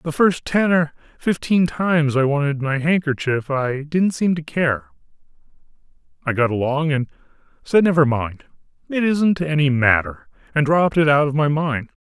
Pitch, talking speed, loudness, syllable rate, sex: 150 Hz, 165 wpm, -19 LUFS, 4.7 syllables/s, male